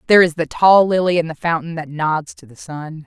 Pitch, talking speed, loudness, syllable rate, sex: 165 Hz, 255 wpm, -16 LUFS, 5.2 syllables/s, female